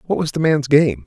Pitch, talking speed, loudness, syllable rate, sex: 140 Hz, 285 wpm, -17 LUFS, 5.5 syllables/s, male